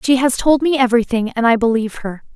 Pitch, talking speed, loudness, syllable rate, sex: 245 Hz, 230 wpm, -15 LUFS, 6.5 syllables/s, female